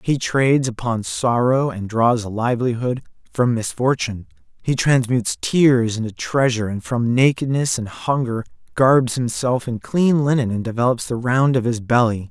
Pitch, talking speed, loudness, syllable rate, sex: 120 Hz, 155 wpm, -19 LUFS, 4.8 syllables/s, male